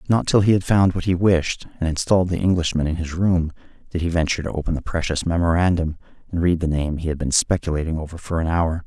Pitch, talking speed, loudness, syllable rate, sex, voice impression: 85 Hz, 235 wpm, -21 LUFS, 6.3 syllables/s, male, very masculine, very middle-aged, very thick, slightly tensed, weak, slightly bright, very soft, very muffled, very fluent, raspy, cool, very intellectual, slightly refreshing, sincere, very calm, very mature, friendly, reassuring, very unique, very elegant, very wild, sweet, slightly lively, kind, modest